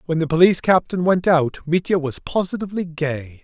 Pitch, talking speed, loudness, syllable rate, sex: 165 Hz, 175 wpm, -19 LUFS, 5.6 syllables/s, male